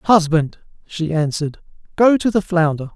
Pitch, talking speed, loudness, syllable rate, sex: 170 Hz, 140 wpm, -18 LUFS, 4.9 syllables/s, male